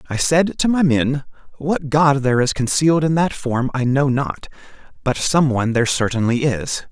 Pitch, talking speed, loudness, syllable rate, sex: 140 Hz, 190 wpm, -18 LUFS, 5.0 syllables/s, male